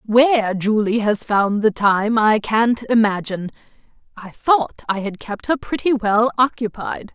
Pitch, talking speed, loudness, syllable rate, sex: 220 Hz, 150 wpm, -18 LUFS, 4.1 syllables/s, female